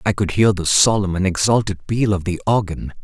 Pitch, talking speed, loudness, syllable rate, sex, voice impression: 95 Hz, 215 wpm, -18 LUFS, 5.3 syllables/s, male, very masculine, very adult-like, very middle-aged, very thick, very tensed, powerful, slightly bright, slightly soft, slightly muffled, fluent, slightly raspy, very cool, intellectual, very sincere, very calm, very mature, friendly, reassuring, unique, elegant, wild, very sweet, slightly lively, kind